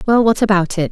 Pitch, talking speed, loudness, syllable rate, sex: 200 Hz, 260 wpm, -14 LUFS, 6.1 syllables/s, female